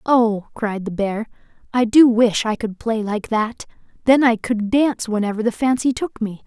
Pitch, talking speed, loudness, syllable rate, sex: 225 Hz, 195 wpm, -19 LUFS, 4.6 syllables/s, female